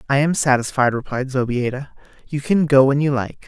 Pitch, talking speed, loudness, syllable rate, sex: 135 Hz, 190 wpm, -19 LUFS, 5.4 syllables/s, male